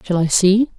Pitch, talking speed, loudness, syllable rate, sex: 195 Hz, 230 wpm, -15 LUFS, 5.1 syllables/s, female